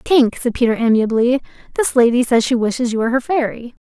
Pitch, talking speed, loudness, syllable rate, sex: 245 Hz, 205 wpm, -16 LUFS, 5.9 syllables/s, female